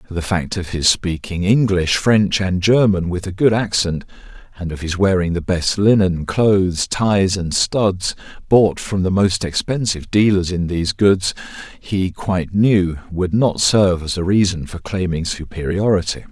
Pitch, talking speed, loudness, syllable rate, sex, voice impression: 95 Hz, 165 wpm, -17 LUFS, 4.4 syllables/s, male, masculine, very adult-like, slightly thick, cool, sincere, slightly wild